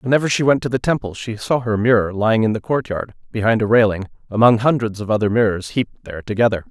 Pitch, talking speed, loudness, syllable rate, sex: 115 Hz, 235 wpm, -18 LUFS, 6.7 syllables/s, male